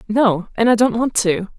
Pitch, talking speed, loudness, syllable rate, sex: 220 Hz, 225 wpm, -17 LUFS, 4.7 syllables/s, female